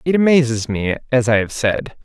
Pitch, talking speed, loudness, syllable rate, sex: 125 Hz, 205 wpm, -17 LUFS, 5.1 syllables/s, male